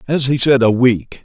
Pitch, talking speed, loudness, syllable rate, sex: 125 Hz, 240 wpm, -14 LUFS, 4.7 syllables/s, male